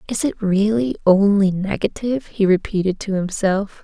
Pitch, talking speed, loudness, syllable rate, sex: 200 Hz, 140 wpm, -19 LUFS, 4.8 syllables/s, female